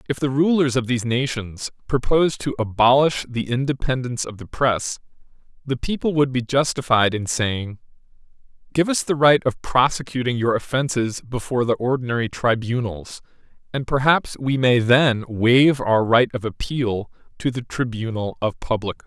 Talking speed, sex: 155 wpm, male